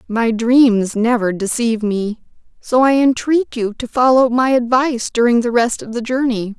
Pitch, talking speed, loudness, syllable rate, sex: 240 Hz, 175 wpm, -15 LUFS, 4.7 syllables/s, female